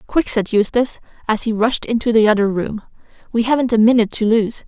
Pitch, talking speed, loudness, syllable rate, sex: 225 Hz, 205 wpm, -17 LUFS, 6.1 syllables/s, female